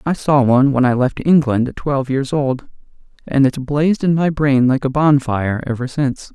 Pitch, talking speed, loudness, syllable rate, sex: 135 Hz, 210 wpm, -16 LUFS, 5.4 syllables/s, male